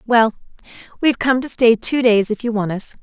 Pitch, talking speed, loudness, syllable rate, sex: 230 Hz, 220 wpm, -17 LUFS, 5.6 syllables/s, female